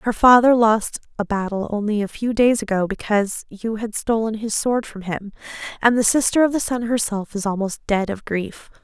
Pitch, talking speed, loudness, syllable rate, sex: 220 Hz, 205 wpm, -20 LUFS, 5.1 syllables/s, female